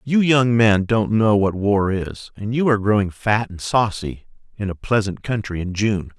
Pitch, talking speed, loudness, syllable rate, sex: 105 Hz, 205 wpm, -19 LUFS, 4.6 syllables/s, male